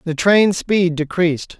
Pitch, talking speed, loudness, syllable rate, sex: 175 Hz, 150 wpm, -16 LUFS, 4.1 syllables/s, male